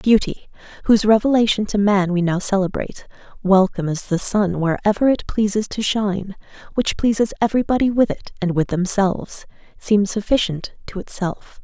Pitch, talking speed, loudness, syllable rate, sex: 200 Hz, 150 wpm, -19 LUFS, 5.4 syllables/s, female